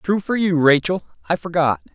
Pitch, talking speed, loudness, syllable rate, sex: 160 Hz, 185 wpm, -19 LUFS, 5.2 syllables/s, male